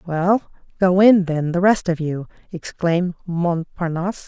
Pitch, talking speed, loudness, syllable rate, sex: 175 Hz, 140 wpm, -19 LUFS, 4.3 syllables/s, female